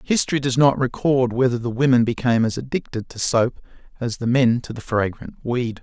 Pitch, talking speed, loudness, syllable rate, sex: 125 Hz, 195 wpm, -20 LUFS, 5.4 syllables/s, male